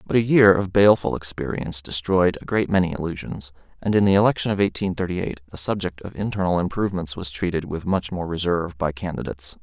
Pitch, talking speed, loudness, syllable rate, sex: 90 Hz, 200 wpm, -22 LUFS, 6.3 syllables/s, male